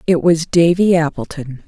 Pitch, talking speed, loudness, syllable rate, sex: 165 Hz, 145 wpm, -14 LUFS, 4.6 syllables/s, female